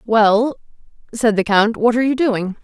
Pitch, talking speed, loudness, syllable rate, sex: 225 Hz, 180 wpm, -16 LUFS, 4.6 syllables/s, female